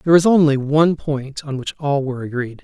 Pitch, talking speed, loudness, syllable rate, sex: 145 Hz, 230 wpm, -18 LUFS, 6.1 syllables/s, male